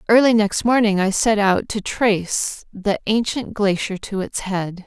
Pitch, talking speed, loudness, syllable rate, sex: 205 Hz, 175 wpm, -19 LUFS, 4.2 syllables/s, female